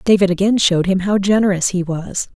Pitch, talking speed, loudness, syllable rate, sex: 190 Hz, 200 wpm, -16 LUFS, 5.8 syllables/s, female